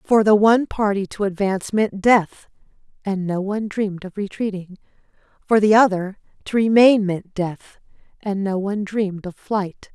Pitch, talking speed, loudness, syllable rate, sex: 200 Hz, 165 wpm, -19 LUFS, 5.0 syllables/s, female